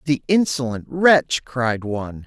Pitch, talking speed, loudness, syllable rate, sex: 135 Hz, 135 wpm, -19 LUFS, 3.9 syllables/s, male